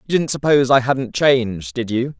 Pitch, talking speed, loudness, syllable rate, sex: 130 Hz, 220 wpm, -17 LUFS, 5.6 syllables/s, male